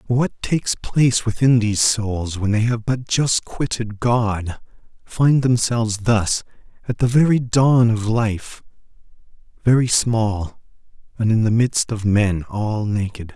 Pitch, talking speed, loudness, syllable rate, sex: 115 Hz, 145 wpm, -19 LUFS, 3.9 syllables/s, male